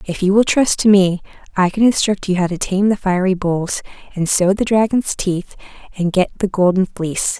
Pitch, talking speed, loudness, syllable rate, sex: 190 Hz, 210 wpm, -16 LUFS, 5.1 syllables/s, female